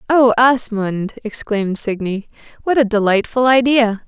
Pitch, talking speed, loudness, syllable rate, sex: 225 Hz, 120 wpm, -16 LUFS, 4.6 syllables/s, female